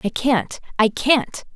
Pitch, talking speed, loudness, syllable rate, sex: 245 Hz, 115 wpm, -19 LUFS, 3.4 syllables/s, female